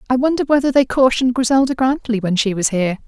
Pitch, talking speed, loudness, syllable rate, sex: 245 Hz, 215 wpm, -16 LUFS, 6.8 syllables/s, female